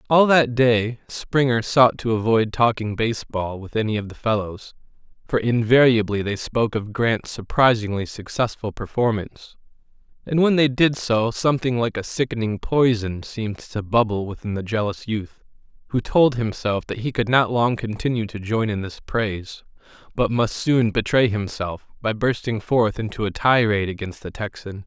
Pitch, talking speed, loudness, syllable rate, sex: 115 Hz, 165 wpm, -21 LUFS, 4.9 syllables/s, male